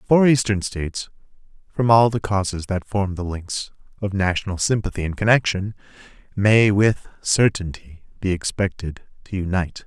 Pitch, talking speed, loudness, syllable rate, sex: 100 Hz, 145 wpm, -21 LUFS, 4.9 syllables/s, male